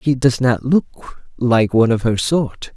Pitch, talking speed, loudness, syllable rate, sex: 125 Hz, 195 wpm, -17 LUFS, 4.1 syllables/s, male